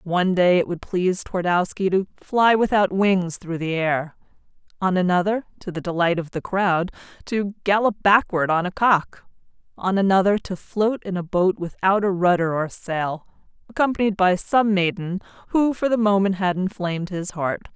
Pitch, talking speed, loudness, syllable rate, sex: 190 Hz, 170 wpm, -21 LUFS, 4.8 syllables/s, female